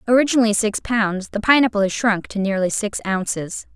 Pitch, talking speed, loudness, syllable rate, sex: 215 Hz, 175 wpm, -19 LUFS, 5.4 syllables/s, female